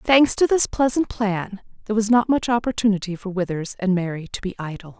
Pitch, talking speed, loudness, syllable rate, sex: 210 Hz, 205 wpm, -21 LUFS, 5.7 syllables/s, female